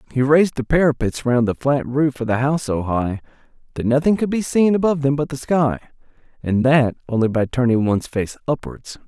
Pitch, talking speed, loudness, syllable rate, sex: 135 Hz, 205 wpm, -19 LUFS, 5.8 syllables/s, male